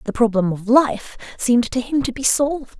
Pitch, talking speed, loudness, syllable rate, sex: 245 Hz, 215 wpm, -18 LUFS, 5.3 syllables/s, female